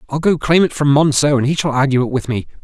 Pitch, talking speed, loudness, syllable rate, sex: 140 Hz, 295 wpm, -15 LUFS, 6.5 syllables/s, male